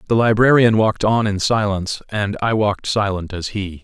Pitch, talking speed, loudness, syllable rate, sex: 105 Hz, 190 wpm, -18 LUFS, 5.4 syllables/s, male